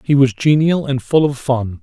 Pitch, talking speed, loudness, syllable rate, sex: 135 Hz, 230 wpm, -15 LUFS, 4.6 syllables/s, male